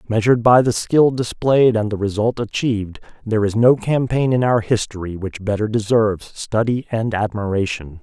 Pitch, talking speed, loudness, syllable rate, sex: 110 Hz, 165 wpm, -18 LUFS, 5.2 syllables/s, male